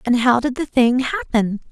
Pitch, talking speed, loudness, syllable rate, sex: 250 Hz, 210 wpm, -18 LUFS, 4.6 syllables/s, female